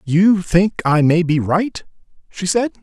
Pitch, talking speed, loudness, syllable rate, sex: 180 Hz, 170 wpm, -16 LUFS, 3.8 syllables/s, male